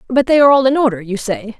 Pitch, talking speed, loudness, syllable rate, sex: 240 Hz, 300 wpm, -14 LUFS, 7.1 syllables/s, female